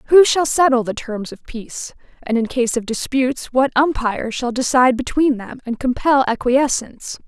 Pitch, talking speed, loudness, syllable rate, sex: 255 Hz, 175 wpm, -18 LUFS, 5.0 syllables/s, female